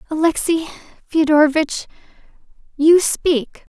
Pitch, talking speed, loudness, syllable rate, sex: 310 Hz, 65 wpm, -17 LUFS, 4.2 syllables/s, female